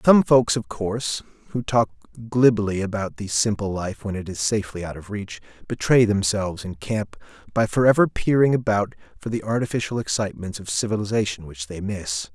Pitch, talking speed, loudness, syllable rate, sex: 105 Hz, 175 wpm, -23 LUFS, 5.3 syllables/s, male